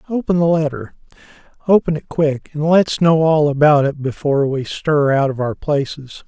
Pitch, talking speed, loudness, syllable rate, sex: 150 Hz, 170 wpm, -16 LUFS, 4.9 syllables/s, male